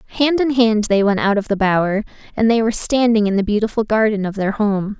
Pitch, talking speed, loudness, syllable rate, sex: 215 Hz, 240 wpm, -17 LUFS, 6.1 syllables/s, female